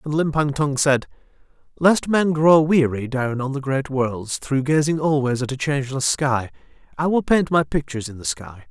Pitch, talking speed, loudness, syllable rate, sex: 140 Hz, 195 wpm, -20 LUFS, 4.9 syllables/s, male